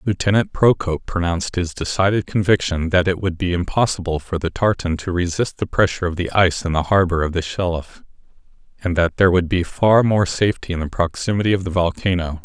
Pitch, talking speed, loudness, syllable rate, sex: 90 Hz, 200 wpm, -19 LUFS, 6.0 syllables/s, male